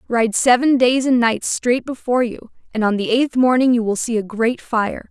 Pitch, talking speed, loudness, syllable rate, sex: 240 Hz, 225 wpm, -17 LUFS, 4.9 syllables/s, female